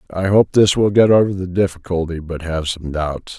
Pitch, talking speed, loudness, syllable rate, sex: 90 Hz, 215 wpm, -17 LUFS, 5.3 syllables/s, male